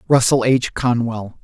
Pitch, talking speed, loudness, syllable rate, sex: 120 Hz, 125 wpm, -17 LUFS, 3.9 syllables/s, male